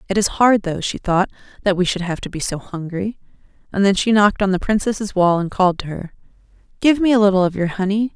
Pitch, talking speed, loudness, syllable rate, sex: 195 Hz, 245 wpm, -18 LUFS, 6.0 syllables/s, female